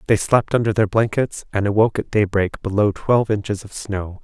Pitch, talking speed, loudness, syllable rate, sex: 105 Hz, 200 wpm, -19 LUFS, 5.5 syllables/s, male